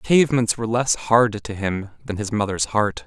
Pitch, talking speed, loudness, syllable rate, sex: 110 Hz, 215 wpm, -21 LUFS, 5.2 syllables/s, male